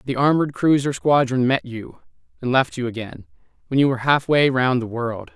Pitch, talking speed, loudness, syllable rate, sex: 130 Hz, 200 wpm, -20 LUFS, 5.5 syllables/s, male